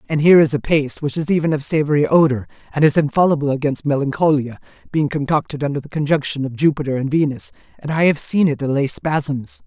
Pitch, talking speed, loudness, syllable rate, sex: 145 Hz, 200 wpm, -18 LUFS, 6.3 syllables/s, female